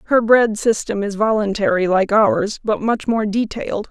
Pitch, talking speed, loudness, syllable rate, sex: 210 Hz, 170 wpm, -17 LUFS, 4.6 syllables/s, female